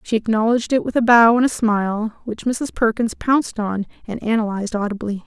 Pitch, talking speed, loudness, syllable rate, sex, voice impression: 225 Hz, 195 wpm, -19 LUFS, 5.8 syllables/s, female, feminine, middle-aged, slightly relaxed, bright, soft, slightly muffled, intellectual, friendly, reassuring, elegant, slightly lively, kind